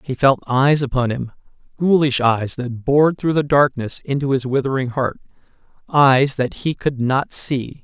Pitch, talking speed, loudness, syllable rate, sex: 135 Hz, 155 wpm, -18 LUFS, 4.4 syllables/s, male